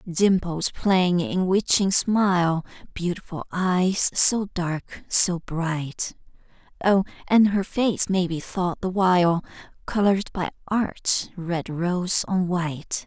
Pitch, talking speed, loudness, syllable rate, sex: 180 Hz, 125 wpm, -23 LUFS, 3.3 syllables/s, female